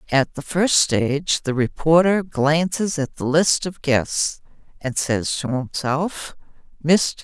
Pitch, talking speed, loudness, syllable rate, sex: 155 Hz, 140 wpm, -20 LUFS, 3.6 syllables/s, female